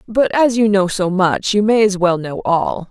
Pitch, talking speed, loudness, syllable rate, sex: 195 Hz, 250 wpm, -15 LUFS, 4.4 syllables/s, female